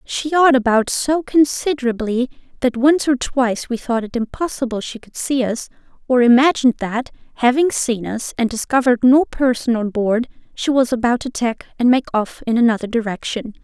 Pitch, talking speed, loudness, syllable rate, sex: 245 Hz, 175 wpm, -18 LUFS, 5.3 syllables/s, female